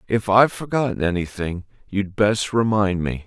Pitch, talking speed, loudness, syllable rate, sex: 100 Hz, 145 wpm, -21 LUFS, 4.8 syllables/s, male